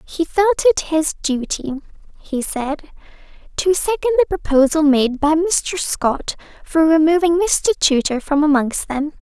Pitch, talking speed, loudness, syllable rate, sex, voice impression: 315 Hz, 140 wpm, -17 LUFS, 4.3 syllables/s, female, very feminine, slightly young, slightly bright, cute, friendly, kind